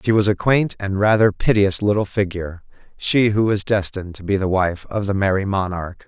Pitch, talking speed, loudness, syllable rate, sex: 100 Hz, 210 wpm, -19 LUFS, 5.4 syllables/s, male